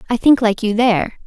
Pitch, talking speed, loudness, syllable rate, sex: 225 Hz, 240 wpm, -15 LUFS, 5.9 syllables/s, female